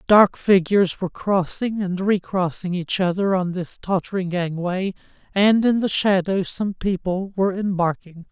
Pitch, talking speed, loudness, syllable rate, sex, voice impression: 185 Hz, 145 wpm, -21 LUFS, 4.5 syllables/s, male, masculine, adult-like, tensed, slightly weak, slightly bright, slightly soft, raspy, friendly, unique, slightly lively, slightly modest